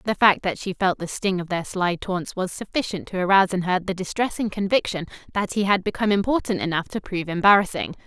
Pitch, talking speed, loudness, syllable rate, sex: 190 Hz, 215 wpm, -23 LUFS, 6.2 syllables/s, female